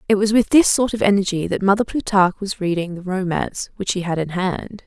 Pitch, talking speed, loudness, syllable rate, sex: 195 Hz, 235 wpm, -19 LUFS, 6.0 syllables/s, female